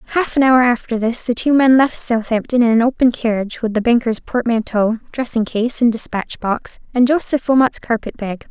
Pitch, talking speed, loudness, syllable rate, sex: 235 Hz, 200 wpm, -16 LUFS, 5.3 syllables/s, female